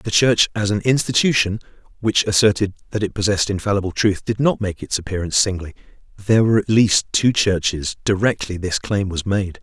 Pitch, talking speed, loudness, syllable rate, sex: 100 Hz, 180 wpm, -19 LUFS, 5.8 syllables/s, male